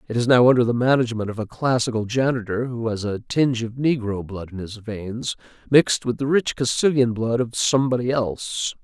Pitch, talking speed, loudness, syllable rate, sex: 120 Hz, 195 wpm, -21 LUFS, 5.5 syllables/s, male